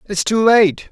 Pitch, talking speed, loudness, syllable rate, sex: 210 Hz, 200 wpm, -14 LUFS, 3.7 syllables/s, male